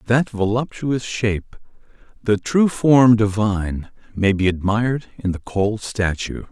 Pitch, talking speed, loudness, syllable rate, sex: 110 Hz, 110 wpm, -19 LUFS, 4.1 syllables/s, male